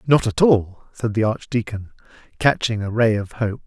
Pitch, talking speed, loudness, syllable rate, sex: 115 Hz, 180 wpm, -20 LUFS, 4.6 syllables/s, male